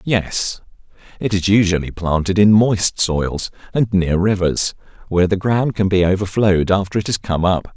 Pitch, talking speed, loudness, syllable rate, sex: 95 Hz, 170 wpm, -17 LUFS, 4.8 syllables/s, male